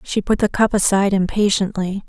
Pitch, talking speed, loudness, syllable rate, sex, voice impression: 200 Hz, 175 wpm, -18 LUFS, 5.6 syllables/s, female, feminine, adult-like, tensed, slightly dark, soft, slightly halting, slightly raspy, calm, elegant, kind, modest